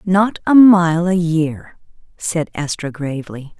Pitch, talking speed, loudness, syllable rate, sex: 170 Hz, 135 wpm, -15 LUFS, 3.6 syllables/s, female